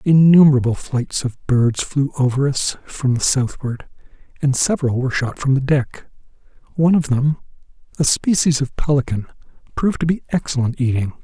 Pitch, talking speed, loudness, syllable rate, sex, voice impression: 135 Hz, 155 wpm, -18 LUFS, 5.3 syllables/s, male, masculine, old, relaxed, slightly weak, slightly halting, raspy, slightly sincere, calm, mature, slightly friendly, slightly wild, kind, slightly modest